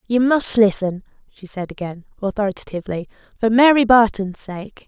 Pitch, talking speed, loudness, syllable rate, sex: 210 Hz, 135 wpm, -18 LUFS, 5.3 syllables/s, female